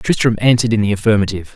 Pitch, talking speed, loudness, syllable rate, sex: 110 Hz, 195 wpm, -15 LUFS, 8.1 syllables/s, male